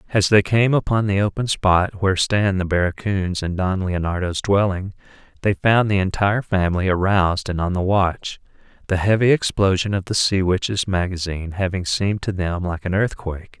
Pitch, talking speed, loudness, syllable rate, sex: 95 Hz, 175 wpm, -20 LUFS, 5.2 syllables/s, male